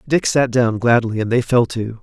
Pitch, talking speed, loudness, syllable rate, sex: 120 Hz, 235 wpm, -17 LUFS, 4.8 syllables/s, male